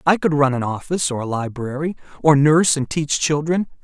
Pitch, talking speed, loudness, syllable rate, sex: 150 Hz, 205 wpm, -19 LUFS, 5.6 syllables/s, male